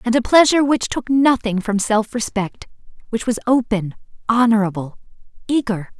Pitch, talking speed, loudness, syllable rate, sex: 225 Hz, 140 wpm, -18 LUFS, 5.1 syllables/s, female